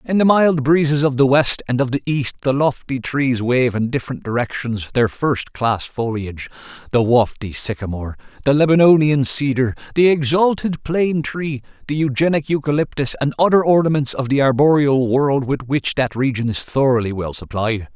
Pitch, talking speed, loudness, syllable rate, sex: 135 Hz, 160 wpm, -18 LUFS, 5.5 syllables/s, male